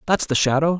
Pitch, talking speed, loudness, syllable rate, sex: 160 Hz, 225 wpm, -19 LUFS, 6.4 syllables/s, male